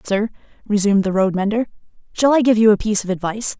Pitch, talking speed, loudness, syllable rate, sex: 210 Hz, 215 wpm, -17 LUFS, 7.1 syllables/s, female